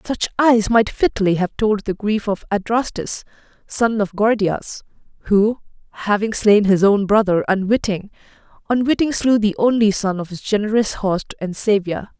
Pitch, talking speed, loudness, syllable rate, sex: 210 Hz, 155 wpm, -18 LUFS, 4.5 syllables/s, female